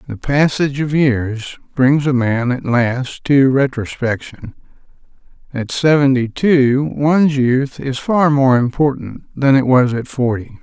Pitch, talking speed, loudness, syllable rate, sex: 130 Hz, 140 wpm, -15 LUFS, 3.9 syllables/s, male